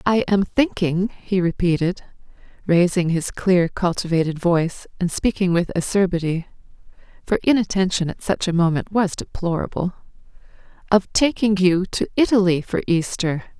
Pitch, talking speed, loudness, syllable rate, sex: 180 Hz, 130 wpm, -20 LUFS, 4.9 syllables/s, female